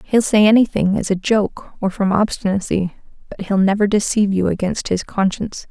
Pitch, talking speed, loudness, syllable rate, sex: 200 Hz, 180 wpm, -18 LUFS, 5.4 syllables/s, female